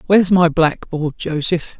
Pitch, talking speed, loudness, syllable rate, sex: 165 Hz, 135 wpm, -17 LUFS, 4.4 syllables/s, male